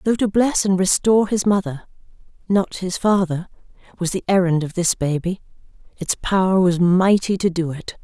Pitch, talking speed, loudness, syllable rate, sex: 185 Hz, 170 wpm, -19 LUFS, 5.0 syllables/s, female